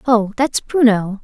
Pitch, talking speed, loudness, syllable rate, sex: 230 Hz, 145 wpm, -16 LUFS, 3.8 syllables/s, female